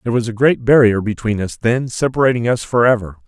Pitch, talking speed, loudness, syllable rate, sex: 115 Hz, 200 wpm, -16 LUFS, 6.1 syllables/s, male